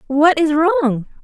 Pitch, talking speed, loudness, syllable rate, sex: 305 Hz, 145 wpm, -15 LUFS, 3.3 syllables/s, female